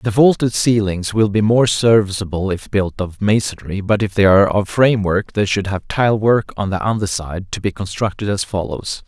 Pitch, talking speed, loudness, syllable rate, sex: 100 Hz, 205 wpm, -17 LUFS, 5.0 syllables/s, male